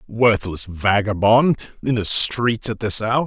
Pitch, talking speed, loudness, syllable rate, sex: 110 Hz, 145 wpm, -18 LUFS, 3.6 syllables/s, male